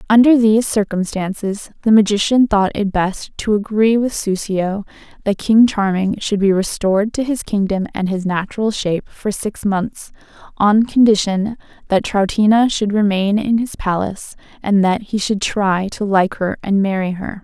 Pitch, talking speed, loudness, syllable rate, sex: 205 Hz, 165 wpm, -17 LUFS, 4.6 syllables/s, female